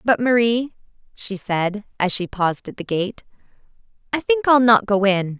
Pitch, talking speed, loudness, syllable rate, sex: 210 Hz, 180 wpm, -19 LUFS, 4.6 syllables/s, female